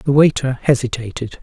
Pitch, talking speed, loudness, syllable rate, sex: 130 Hz, 125 wpm, -17 LUFS, 5.0 syllables/s, male